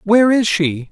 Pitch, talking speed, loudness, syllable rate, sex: 200 Hz, 195 wpm, -14 LUFS, 4.6 syllables/s, male